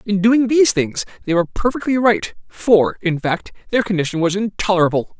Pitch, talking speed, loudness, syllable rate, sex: 200 Hz, 175 wpm, -17 LUFS, 5.5 syllables/s, male